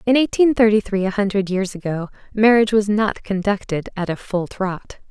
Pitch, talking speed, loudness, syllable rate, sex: 200 Hz, 190 wpm, -19 LUFS, 5.2 syllables/s, female